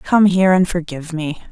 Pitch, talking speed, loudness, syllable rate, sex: 175 Hz, 200 wpm, -16 LUFS, 5.8 syllables/s, female